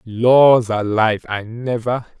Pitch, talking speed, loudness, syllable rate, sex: 115 Hz, 110 wpm, -16 LUFS, 3.6 syllables/s, male